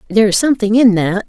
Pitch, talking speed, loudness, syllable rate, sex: 210 Hz, 235 wpm, -13 LUFS, 7.8 syllables/s, female